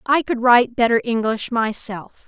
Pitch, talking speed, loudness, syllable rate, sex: 235 Hz, 160 wpm, -18 LUFS, 4.7 syllables/s, female